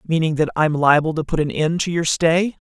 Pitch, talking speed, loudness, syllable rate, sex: 160 Hz, 250 wpm, -18 LUFS, 5.4 syllables/s, male